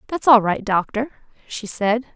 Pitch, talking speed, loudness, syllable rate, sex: 225 Hz, 165 wpm, -19 LUFS, 4.8 syllables/s, female